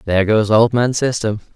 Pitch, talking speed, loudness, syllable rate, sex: 110 Hz, 195 wpm, -16 LUFS, 5.4 syllables/s, male